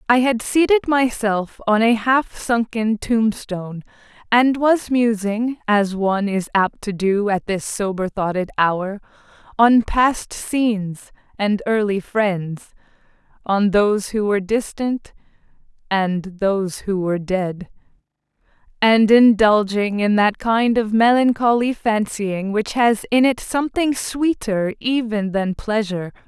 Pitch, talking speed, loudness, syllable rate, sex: 215 Hz, 125 wpm, -19 LUFS, 3.9 syllables/s, female